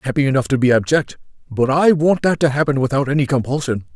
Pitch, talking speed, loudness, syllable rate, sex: 135 Hz, 230 wpm, -17 LUFS, 6.6 syllables/s, male